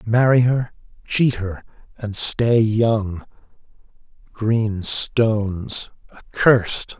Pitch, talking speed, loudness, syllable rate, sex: 110 Hz, 85 wpm, -19 LUFS, 3.0 syllables/s, male